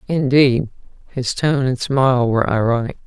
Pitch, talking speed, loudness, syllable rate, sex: 130 Hz, 135 wpm, -17 LUFS, 4.9 syllables/s, female